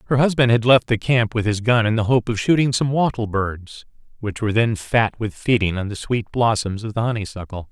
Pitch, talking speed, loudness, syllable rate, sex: 110 Hz, 235 wpm, -19 LUFS, 5.4 syllables/s, male